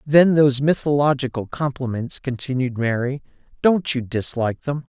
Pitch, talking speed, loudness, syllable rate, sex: 135 Hz, 120 wpm, -21 LUFS, 5.0 syllables/s, male